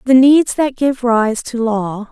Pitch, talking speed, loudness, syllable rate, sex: 245 Hz, 200 wpm, -14 LUFS, 3.6 syllables/s, female